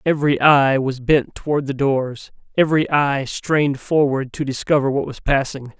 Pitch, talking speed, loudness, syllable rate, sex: 140 Hz, 155 wpm, -19 LUFS, 4.8 syllables/s, male